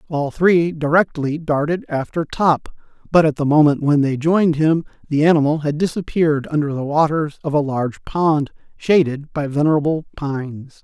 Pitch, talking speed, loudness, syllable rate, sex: 150 Hz, 160 wpm, -18 LUFS, 5.0 syllables/s, male